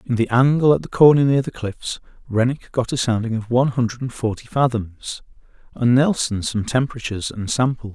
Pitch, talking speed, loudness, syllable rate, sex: 120 Hz, 180 wpm, -19 LUFS, 5.4 syllables/s, male